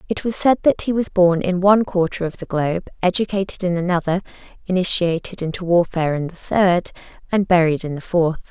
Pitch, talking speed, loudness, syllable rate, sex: 180 Hz, 190 wpm, -19 LUFS, 5.8 syllables/s, female